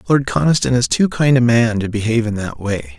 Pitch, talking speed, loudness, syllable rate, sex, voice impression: 115 Hz, 240 wpm, -16 LUFS, 5.7 syllables/s, male, masculine, adult-like, slightly bright, soft, raspy, cool, friendly, reassuring, kind, modest